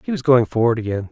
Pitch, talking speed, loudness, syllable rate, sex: 120 Hz, 270 wpm, -18 LUFS, 6.9 syllables/s, male